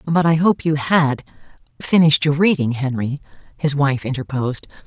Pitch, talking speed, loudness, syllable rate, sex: 145 Hz, 150 wpm, -18 LUFS, 5.1 syllables/s, female